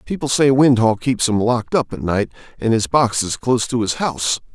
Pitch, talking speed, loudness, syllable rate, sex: 120 Hz, 225 wpm, -18 LUFS, 5.5 syllables/s, male